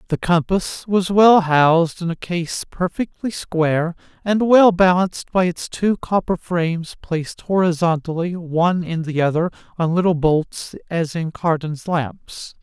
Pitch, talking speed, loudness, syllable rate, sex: 170 Hz, 145 wpm, -19 LUFS, 4.3 syllables/s, male